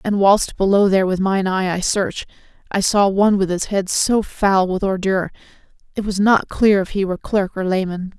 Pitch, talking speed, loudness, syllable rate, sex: 195 Hz, 215 wpm, -18 LUFS, 5.2 syllables/s, female